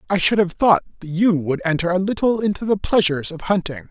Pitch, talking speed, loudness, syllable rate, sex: 180 Hz, 215 wpm, -19 LUFS, 5.9 syllables/s, male